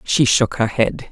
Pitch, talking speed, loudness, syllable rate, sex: 120 Hz, 215 wpm, -17 LUFS, 4.0 syllables/s, female